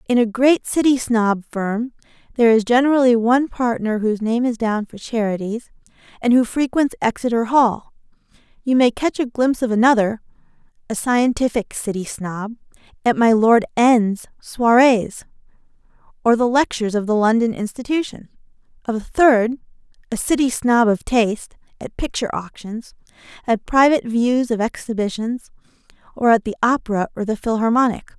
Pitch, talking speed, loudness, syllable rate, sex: 235 Hz, 145 wpm, -18 LUFS, 4.8 syllables/s, female